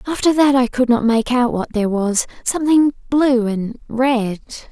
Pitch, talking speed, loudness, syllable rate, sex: 250 Hz, 180 wpm, -17 LUFS, 4.6 syllables/s, female